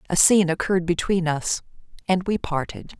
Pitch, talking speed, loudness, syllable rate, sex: 180 Hz, 140 wpm, -22 LUFS, 5.6 syllables/s, female